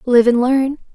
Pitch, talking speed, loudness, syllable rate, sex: 255 Hz, 190 wpm, -15 LUFS, 4.4 syllables/s, female